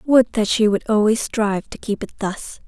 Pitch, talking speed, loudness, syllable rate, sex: 215 Hz, 225 wpm, -19 LUFS, 4.8 syllables/s, female